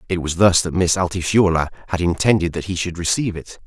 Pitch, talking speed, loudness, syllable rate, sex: 90 Hz, 215 wpm, -19 LUFS, 6.3 syllables/s, male